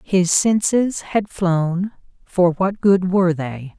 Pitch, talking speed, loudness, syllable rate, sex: 185 Hz, 145 wpm, -18 LUFS, 3.3 syllables/s, female